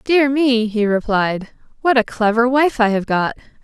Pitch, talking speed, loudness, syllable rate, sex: 235 Hz, 180 wpm, -17 LUFS, 4.4 syllables/s, female